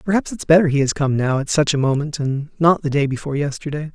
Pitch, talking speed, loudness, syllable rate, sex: 150 Hz, 260 wpm, -19 LUFS, 6.4 syllables/s, male